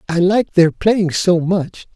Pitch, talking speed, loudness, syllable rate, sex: 180 Hz, 185 wpm, -15 LUFS, 4.1 syllables/s, male